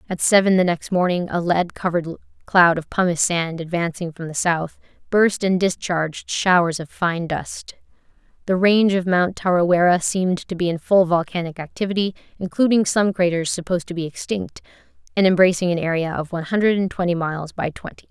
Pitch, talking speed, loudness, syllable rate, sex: 175 Hz, 180 wpm, -20 LUFS, 5.7 syllables/s, female